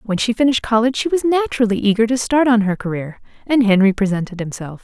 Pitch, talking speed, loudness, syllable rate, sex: 225 Hz, 210 wpm, -17 LUFS, 6.7 syllables/s, female